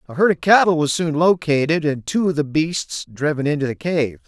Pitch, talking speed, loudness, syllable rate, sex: 155 Hz, 225 wpm, -19 LUFS, 5.3 syllables/s, male